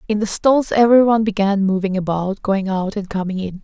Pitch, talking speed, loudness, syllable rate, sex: 200 Hz, 200 wpm, -17 LUFS, 5.5 syllables/s, female